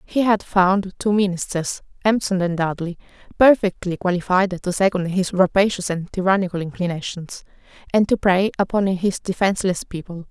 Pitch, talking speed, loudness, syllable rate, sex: 190 Hz, 140 wpm, -20 LUFS, 5.1 syllables/s, female